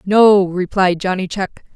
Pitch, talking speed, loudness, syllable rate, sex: 190 Hz, 135 wpm, -15 LUFS, 4.2 syllables/s, female